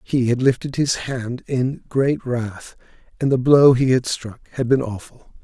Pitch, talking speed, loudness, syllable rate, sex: 125 Hz, 190 wpm, -19 LUFS, 4.1 syllables/s, male